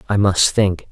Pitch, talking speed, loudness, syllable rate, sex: 95 Hz, 195 wpm, -16 LUFS, 4.2 syllables/s, male